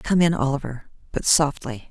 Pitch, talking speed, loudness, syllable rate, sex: 140 Hz, 160 wpm, -21 LUFS, 4.9 syllables/s, female